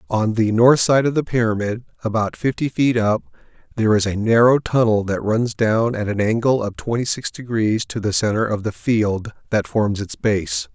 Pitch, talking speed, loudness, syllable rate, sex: 115 Hz, 200 wpm, -19 LUFS, 4.9 syllables/s, male